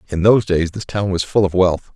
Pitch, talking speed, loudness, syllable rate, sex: 95 Hz, 275 wpm, -17 LUFS, 5.8 syllables/s, male